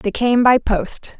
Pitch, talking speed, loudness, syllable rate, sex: 235 Hz, 200 wpm, -16 LUFS, 3.5 syllables/s, female